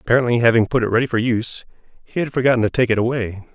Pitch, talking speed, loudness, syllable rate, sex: 120 Hz, 235 wpm, -18 LUFS, 7.4 syllables/s, male